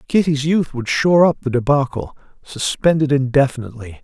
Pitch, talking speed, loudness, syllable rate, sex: 140 Hz, 150 wpm, -17 LUFS, 5.7 syllables/s, male